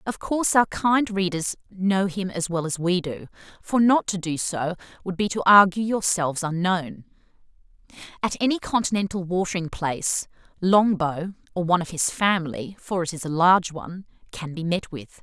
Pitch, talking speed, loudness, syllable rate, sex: 185 Hz, 165 wpm, -23 LUFS, 5.1 syllables/s, female